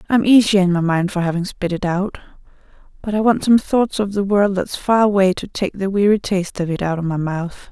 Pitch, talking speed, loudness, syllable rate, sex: 195 Hz, 250 wpm, -18 LUFS, 5.5 syllables/s, female